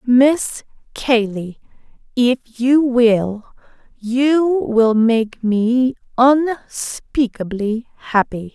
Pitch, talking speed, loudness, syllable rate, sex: 240 Hz, 75 wpm, -17 LUFS, 2.4 syllables/s, female